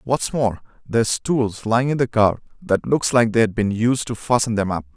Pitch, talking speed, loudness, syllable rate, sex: 115 Hz, 220 wpm, -20 LUFS, 4.9 syllables/s, male